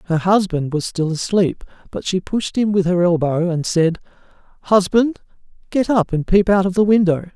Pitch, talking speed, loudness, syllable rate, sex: 185 Hz, 190 wpm, -18 LUFS, 4.9 syllables/s, male